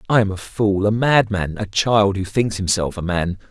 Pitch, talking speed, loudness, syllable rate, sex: 100 Hz, 225 wpm, -19 LUFS, 4.7 syllables/s, male